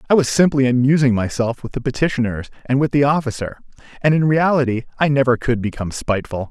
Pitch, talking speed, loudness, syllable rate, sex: 130 Hz, 185 wpm, -18 LUFS, 6.4 syllables/s, male